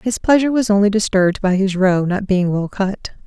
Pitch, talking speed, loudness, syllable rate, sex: 200 Hz, 220 wpm, -16 LUFS, 5.5 syllables/s, female